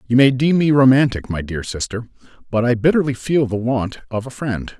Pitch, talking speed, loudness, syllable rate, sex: 125 Hz, 215 wpm, -18 LUFS, 5.3 syllables/s, male